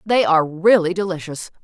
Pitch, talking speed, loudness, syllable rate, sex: 175 Hz, 145 wpm, -17 LUFS, 5.6 syllables/s, female